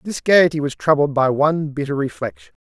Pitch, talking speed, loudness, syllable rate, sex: 145 Hz, 180 wpm, -18 LUFS, 5.7 syllables/s, male